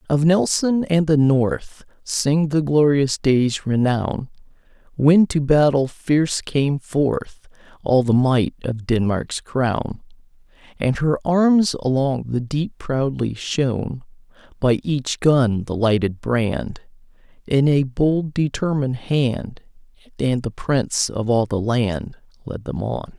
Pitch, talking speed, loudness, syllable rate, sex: 135 Hz, 130 wpm, -20 LUFS, 3.4 syllables/s, male